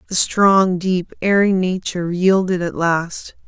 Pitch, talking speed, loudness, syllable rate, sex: 185 Hz, 140 wpm, -17 LUFS, 3.8 syllables/s, female